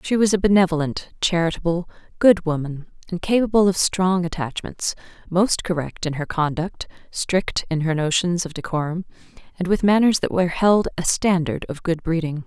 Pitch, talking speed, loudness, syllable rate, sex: 175 Hz, 165 wpm, -21 LUFS, 5.1 syllables/s, female